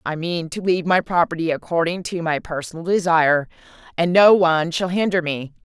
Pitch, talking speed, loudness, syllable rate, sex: 170 Hz, 180 wpm, -19 LUFS, 5.6 syllables/s, female